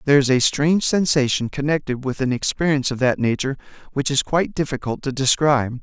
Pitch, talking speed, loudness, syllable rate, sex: 140 Hz, 185 wpm, -20 LUFS, 6.4 syllables/s, male